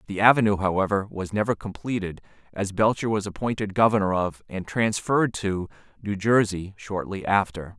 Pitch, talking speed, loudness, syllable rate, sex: 100 Hz, 145 wpm, -24 LUFS, 5.2 syllables/s, male